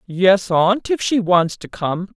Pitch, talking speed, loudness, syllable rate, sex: 190 Hz, 190 wpm, -17 LUFS, 3.5 syllables/s, female